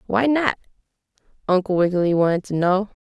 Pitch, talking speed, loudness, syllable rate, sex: 195 Hz, 140 wpm, -20 LUFS, 6.0 syllables/s, female